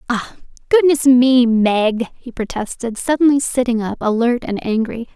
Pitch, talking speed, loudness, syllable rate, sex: 245 Hz, 140 wpm, -16 LUFS, 4.5 syllables/s, female